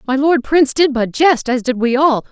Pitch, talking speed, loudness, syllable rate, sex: 270 Hz, 260 wpm, -14 LUFS, 5.2 syllables/s, female